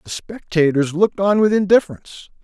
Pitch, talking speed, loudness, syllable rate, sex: 185 Hz, 150 wpm, -16 LUFS, 5.8 syllables/s, male